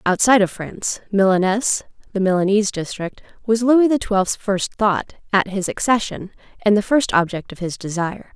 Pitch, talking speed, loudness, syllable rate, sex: 205 Hz, 165 wpm, -19 LUFS, 4.8 syllables/s, female